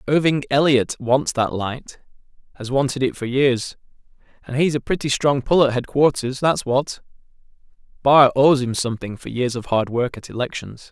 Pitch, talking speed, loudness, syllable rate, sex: 130 Hz, 160 wpm, -20 LUFS, 4.9 syllables/s, male